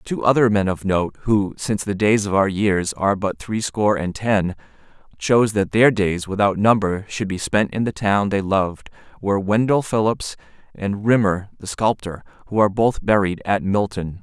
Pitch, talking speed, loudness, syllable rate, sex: 100 Hz, 185 wpm, -20 LUFS, 5.0 syllables/s, male